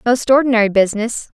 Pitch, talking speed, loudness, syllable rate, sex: 230 Hz, 130 wpm, -15 LUFS, 6.6 syllables/s, female